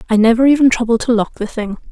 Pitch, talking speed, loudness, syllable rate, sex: 235 Hz, 250 wpm, -14 LUFS, 6.9 syllables/s, female